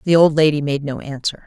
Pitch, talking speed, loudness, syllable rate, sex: 150 Hz, 245 wpm, -18 LUFS, 5.9 syllables/s, female